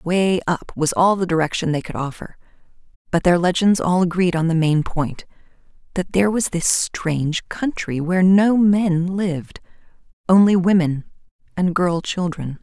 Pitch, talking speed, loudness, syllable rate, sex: 175 Hz, 145 wpm, -19 LUFS, 4.6 syllables/s, female